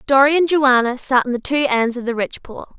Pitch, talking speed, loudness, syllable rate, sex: 260 Hz, 260 wpm, -17 LUFS, 5.9 syllables/s, female